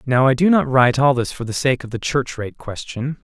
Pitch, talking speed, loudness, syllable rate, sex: 130 Hz, 270 wpm, -18 LUFS, 5.4 syllables/s, male